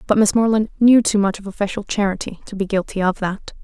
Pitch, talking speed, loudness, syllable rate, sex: 205 Hz, 230 wpm, -18 LUFS, 6.4 syllables/s, female